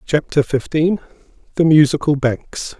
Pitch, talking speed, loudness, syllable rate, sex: 150 Hz, 105 wpm, -17 LUFS, 4.3 syllables/s, male